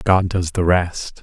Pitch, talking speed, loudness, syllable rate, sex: 90 Hz, 195 wpm, -19 LUFS, 3.5 syllables/s, male